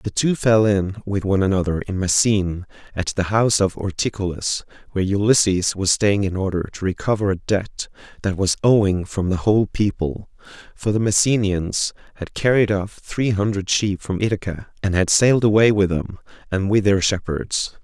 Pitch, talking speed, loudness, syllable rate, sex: 100 Hz, 175 wpm, -20 LUFS, 5.1 syllables/s, male